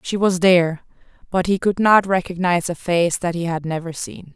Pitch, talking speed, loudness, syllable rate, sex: 175 Hz, 195 wpm, -19 LUFS, 5.3 syllables/s, female